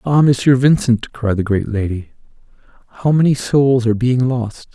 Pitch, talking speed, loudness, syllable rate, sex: 125 Hz, 165 wpm, -15 LUFS, 4.9 syllables/s, male